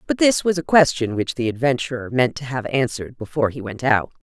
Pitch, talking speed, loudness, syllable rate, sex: 135 Hz, 225 wpm, -20 LUFS, 6.0 syllables/s, female